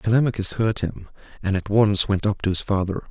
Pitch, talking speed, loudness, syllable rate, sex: 100 Hz, 210 wpm, -21 LUFS, 5.6 syllables/s, male